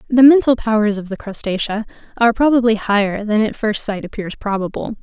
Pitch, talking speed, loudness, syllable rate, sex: 220 Hz, 180 wpm, -17 LUFS, 5.8 syllables/s, female